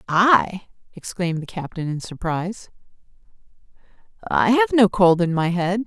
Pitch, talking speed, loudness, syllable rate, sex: 190 Hz, 135 wpm, -20 LUFS, 4.7 syllables/s, female